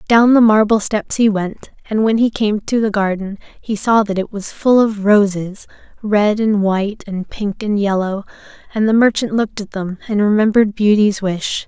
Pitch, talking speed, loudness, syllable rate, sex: 210 Hz, 195 wpm, -16 LUFS, 4.8 syllables/s, female